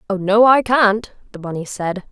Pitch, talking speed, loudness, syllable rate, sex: 205 Hz, 200 wpm, -16 LUFS, 4.6 syllables/s, female